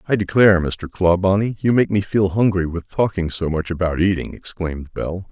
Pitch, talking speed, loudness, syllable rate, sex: 90 Hz, 190 wpm, -19 LUFS, 5.3 syllables/s, male